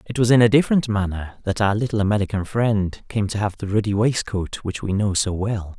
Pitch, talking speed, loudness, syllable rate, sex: 105 Hz, 230 wpm, -21 LUFS, 5.6 syllables/s, male